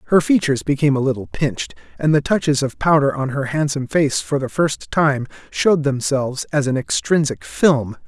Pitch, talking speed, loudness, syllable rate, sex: 140 Hz, 185 wpm, -19 LUFS, 5.5 syllables/s, male